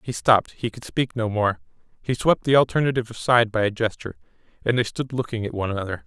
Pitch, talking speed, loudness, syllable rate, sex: 115 Hz, 215 wpm, -22 LUFS, 6.9 syllables/s, male